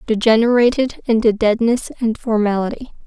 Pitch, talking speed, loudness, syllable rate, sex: 225 Hz, 100 wpm, -17 LUFS, 5.3 syllables/s, female